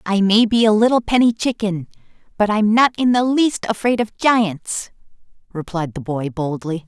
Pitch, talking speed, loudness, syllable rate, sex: 210 Hz, 175 wpm, -18 LUFS, 4.7 syllables/s, male